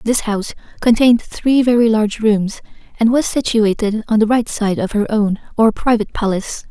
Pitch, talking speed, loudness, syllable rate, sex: 220 Hz, 180 wpm, -16 LUFS, 5.4 syllables/s, female